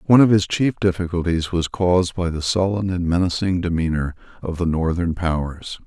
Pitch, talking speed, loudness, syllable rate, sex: 90 Hz, 175 wpm, -20 LUFS, 5.4 syllables/s, male